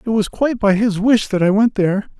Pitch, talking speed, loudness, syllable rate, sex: 210 Hz, 275 wpm, -16 LUFS, 6.1 syllables/s, male